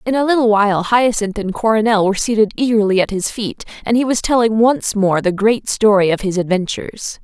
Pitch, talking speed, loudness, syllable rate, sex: 215 Hz, 205 wpm, -15 LUFS, 5.7 syllables/s, female